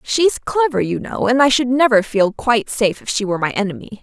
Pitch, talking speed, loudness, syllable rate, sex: 235 Hz, 240 wpm, -17 LUFS, 5.9 syllables/s, female